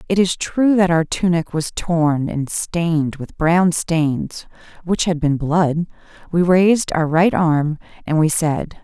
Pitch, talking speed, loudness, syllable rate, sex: 165 Hz, 170 wpm, -18 LUFS, 3.7 syllables/s, female